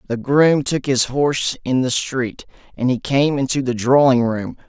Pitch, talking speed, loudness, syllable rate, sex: 130 Hz, 190 wpm, -18 LUFS, 4.4 syllables/s, male